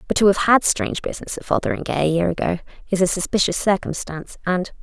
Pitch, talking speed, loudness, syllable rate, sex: 190 Hz, 200 wpm, -20 LUFS, 6.7 syllables/s, female